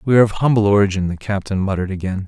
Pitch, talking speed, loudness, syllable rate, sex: 100 Hz, 235 wpm, -18 LUFS, 7.6 syllables/s, male